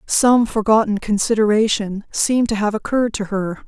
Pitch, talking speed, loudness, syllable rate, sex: 215 Hz, 145 wpm, -18 LUFS, 5.2 syllables/s, female